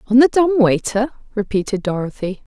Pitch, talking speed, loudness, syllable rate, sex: 225 Hz, 140 wpm, -18 LUFS, 5.2 syllables/s, female